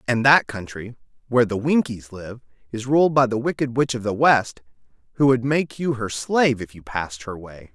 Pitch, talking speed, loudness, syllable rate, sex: 120 Hz, 210 wpm, -21 LUFS, 5.1 syllables/s, male